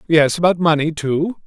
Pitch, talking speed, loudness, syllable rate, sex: 160 Hz, 165 wpm, -17 LUFS, 4.8 syllables/s, male